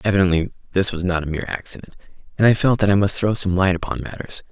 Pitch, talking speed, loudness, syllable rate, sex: 95 Hz, 225 wpm, -20 LUFS, 6.7 syllables/s, male